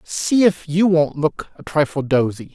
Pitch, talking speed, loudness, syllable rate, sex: 160 Hz, 190 wpm, -18 LUFS, 4.3 syllables/s, male